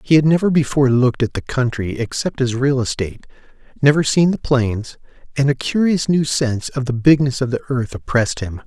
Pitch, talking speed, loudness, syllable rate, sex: 130 Hz, 200 wpm, -18 LUFS, 5.7 syllables/s, male